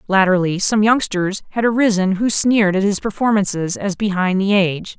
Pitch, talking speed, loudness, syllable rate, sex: 200 Hz, 170 wpm, -17 LUFS, 5.3 syllables/s, female